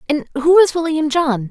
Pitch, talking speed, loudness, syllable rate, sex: 295 Hz, 200 wpm, -15 LUFS, 4.8 syllables/s, female